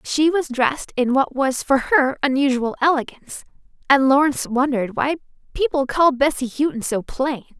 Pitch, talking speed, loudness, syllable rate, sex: 270 Hz, 160 wpm, -19 LUFS, 5.3 syllables/s, female